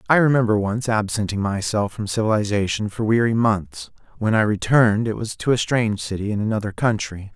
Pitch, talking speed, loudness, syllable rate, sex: 110 Hz, 180 wpm, -21 LUFS, 5.7 syllables/s, male